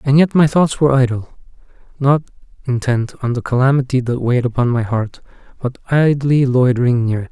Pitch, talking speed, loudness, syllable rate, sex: 130 Hz, 170 wpm, -16 LUFS, 5.7 syllables/s, male